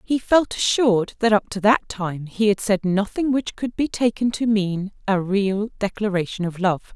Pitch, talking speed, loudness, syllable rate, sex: 210 Hz, 200 wpm, -21 LUFS, 4.6 syllables/s, female